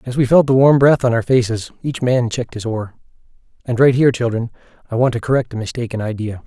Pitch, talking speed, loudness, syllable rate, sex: 120 Hz, 230 wpm, -17 LUFS, 6.4 syllables/s, male